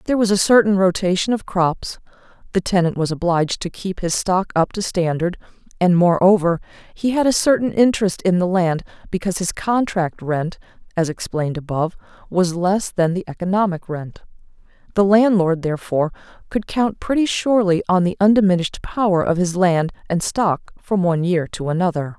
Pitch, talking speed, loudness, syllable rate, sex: 185 Hz, 170 wpm, -19 LUFS, 5.3 syllables/s, female